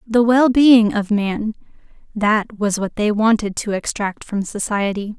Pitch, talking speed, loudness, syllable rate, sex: 215 Hz, 150 wpm, -18 LUFS, 4.0 syllables/s, female